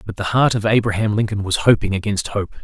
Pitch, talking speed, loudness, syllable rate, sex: 105 Hz, 230 wpm, -18 LUFS, 6.0 syllables/s, male